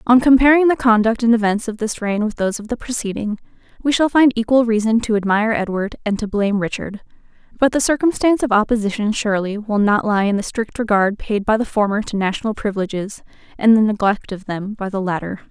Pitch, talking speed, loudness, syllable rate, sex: 220 Hz, 210 wpm, -18 LUFS, 6.1 syllables/s, female